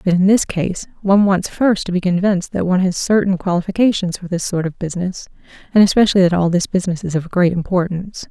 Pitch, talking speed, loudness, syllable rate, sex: 185 Hz, 215 wpm, -17 LUFS, 6.5 syllables/s, female